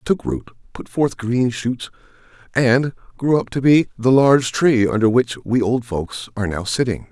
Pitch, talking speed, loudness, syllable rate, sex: 120 Hz, 195 wpm, -18 LUFS, 4.7 syllables/s, male